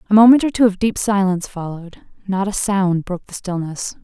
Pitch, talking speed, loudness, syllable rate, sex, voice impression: 195 Hz, 210 wpm, -17 LUFS, 5.9 syllables/s, female, very feminine, young, very thin, tensed, slightly weak, bright, slightly soft, clear, fluent, very cute, intellectual, very refreshing, sincere, calm, friendly, reassuring, unique, elegant, slightly wild, sweet, slightly lively, very kind, slightly modest, light